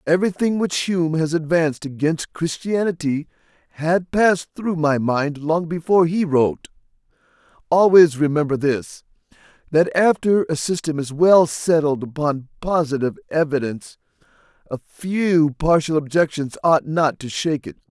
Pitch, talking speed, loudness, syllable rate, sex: 160 Hz, 130 wpm, -19 LUFS, 4.8 syllables/s, male